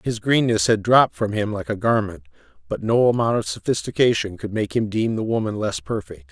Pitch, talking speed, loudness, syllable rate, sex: 110 Hz, 210 wpm, -21 LUFS, 5.6 syllables/s, male